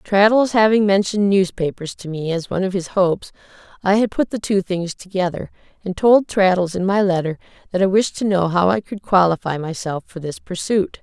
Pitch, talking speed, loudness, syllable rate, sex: 190 Hz, 200 wpm, -19 LUFS, 5.4 syllables/s, female